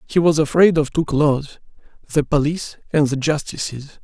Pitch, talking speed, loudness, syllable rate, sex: 150 Hz, 150 wpm, -19 LUFS, 5.2 syllables/s, male